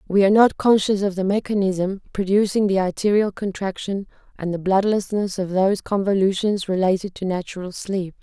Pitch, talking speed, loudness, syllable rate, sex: 195 Hz, 155 wpm, -21 LUFS, 5.4 syllables/s, female